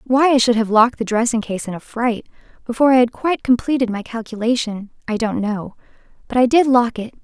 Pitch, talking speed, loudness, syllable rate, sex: 235 Hz, 215 wpm, -18 LUFS, 6.0 syllables/s, female